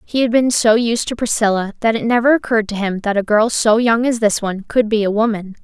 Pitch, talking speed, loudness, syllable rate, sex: 220 Hz, 265 wpm, -16 LUFS, 6.0 syllables/s, female